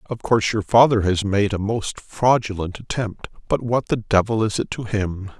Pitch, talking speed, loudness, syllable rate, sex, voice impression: 105 Hz, 200 wpm, -21 LUFS, 4.9 syllables/s, male, masculine, middle-aged, slightly relaxed, powerful, muffled, slightly halting, raspy, calm, mature, wild, strict